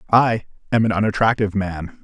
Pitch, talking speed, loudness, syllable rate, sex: 105 Hz, 150 wpm, -19 LUFS, 6.0 syllables/s, male